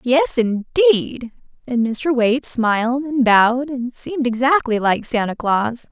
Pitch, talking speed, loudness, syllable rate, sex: 250 Hz, 140 wpm, -18 LUFS, 4.0 syllables/s, female